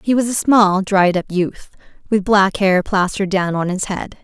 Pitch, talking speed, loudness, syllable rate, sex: 195 Hz, 215 wpm, -16 LUFS, 4.6 syllables/s, female